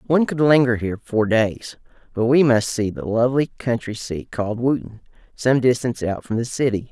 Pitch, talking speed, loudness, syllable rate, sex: 120 Hz, 190 wpm, -20 LUFS, 5.4 syllables/s, male